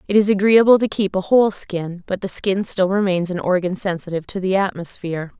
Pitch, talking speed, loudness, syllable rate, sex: 190 Hz, 210 wpm, -19 LUFS, 5.9 syllables/s, female